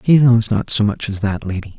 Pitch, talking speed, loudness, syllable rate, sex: 110 Hz, 270 wpm, -17 LUFS, 5.3 syllables/s, male